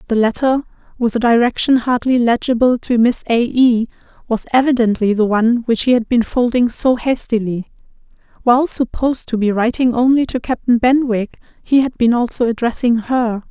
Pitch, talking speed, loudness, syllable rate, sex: 240 Hz, 165 wpm, -15 LUFS, 5.3 syllables/s, female